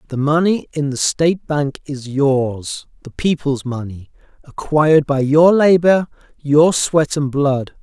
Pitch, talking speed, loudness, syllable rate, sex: 145 Hz, 145 wpm, -16 LUFS, 3.9 syllables/s, male